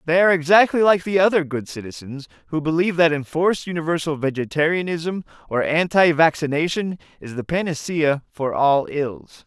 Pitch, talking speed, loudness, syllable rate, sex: 160 Hz, 145 wpm, -20 LUFS, 5.4 syllables/s, male